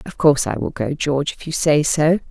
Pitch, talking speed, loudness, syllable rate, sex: 145 Hz, 260 wpm, -19 LUFS, 5.8 syllables/s, female